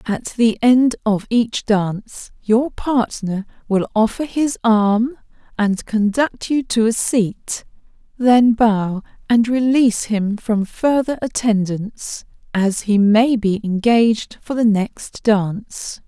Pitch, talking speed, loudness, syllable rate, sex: 225 Hz, 130 wpm, -18 LUFS, 3.5 syllables/s, female